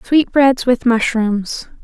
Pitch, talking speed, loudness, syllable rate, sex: 245 Hz, 100 wpm, -15 LUFS, 3.1 syllables/s, female